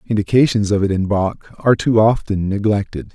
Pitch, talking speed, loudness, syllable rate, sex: 105 Hz, 170 wpm, -17 LUFS, 5.6 syllables/s, male